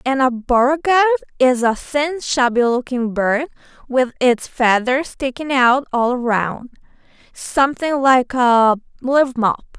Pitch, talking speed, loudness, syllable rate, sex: 260 Hz, 125 wpm, -17 LUFS, 3.9 syllables/s, female